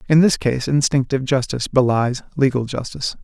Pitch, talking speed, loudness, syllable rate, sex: 130 Hz, 150 wpm, -19 LUFS, 5.9 syllables/s, male